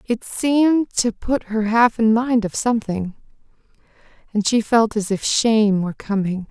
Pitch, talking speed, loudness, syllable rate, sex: 220 Hz, 165 wpm, -19 LUFS, 4.6 syllables/s, female